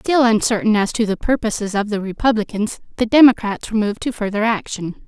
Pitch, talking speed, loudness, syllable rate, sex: 220 Hz, 190 wpm, -18 LUFS, 6.0 syllables/s, female